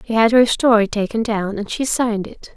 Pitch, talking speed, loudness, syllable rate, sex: 220 Hz, 235 wpm, -17 LUFS, 5.3 syllables/s, female